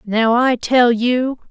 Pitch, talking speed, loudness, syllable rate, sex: 240 Hz, 160 wpm, -15 LUFS, 3.0 syllables/s, female